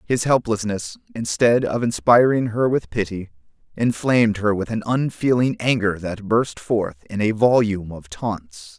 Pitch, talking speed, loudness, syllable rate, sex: 110 Hz, 150 wpm, -20 LUFS, 4.4 syllables/s, male